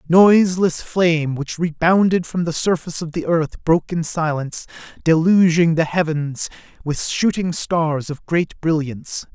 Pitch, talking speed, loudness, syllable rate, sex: 165 Hz, 140 wpm, -19 LUFS, 4.5 syllables/s, male